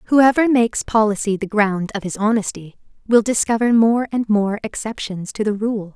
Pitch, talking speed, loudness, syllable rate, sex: 215 Hz, 170 wpm, -18 LUFS, 4.9 syllables/s, female